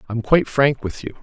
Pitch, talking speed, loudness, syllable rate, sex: 130 Hz, 245 wpm, -19 LUFS, 6.1 syllables/s, male